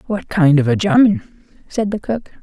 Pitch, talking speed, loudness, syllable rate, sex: 215 Hz, 200 wpm, -16 LUFS, 5.2 syllables/s, female